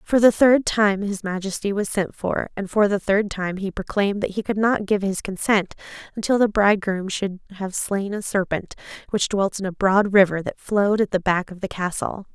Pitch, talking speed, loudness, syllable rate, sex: 200 Hz, 220 wpm, -22 LUFS, 5.1 syllables/s, female